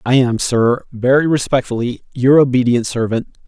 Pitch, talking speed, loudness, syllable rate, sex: 125 Hz, 140 wpm, -15 LUFS, 4.9 syllables/s, male